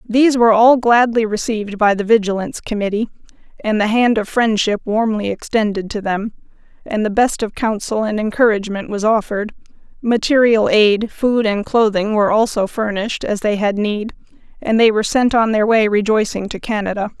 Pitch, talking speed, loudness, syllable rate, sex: 215 Hz, 170 wpm, -16 LUFS, 5.5 syllables/s, female